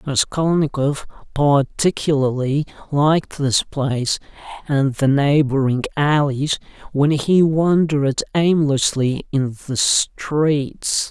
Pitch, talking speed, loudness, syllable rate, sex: 145 Hz, 85 wpm, -18 LUFS, 3.5 syllables/s, male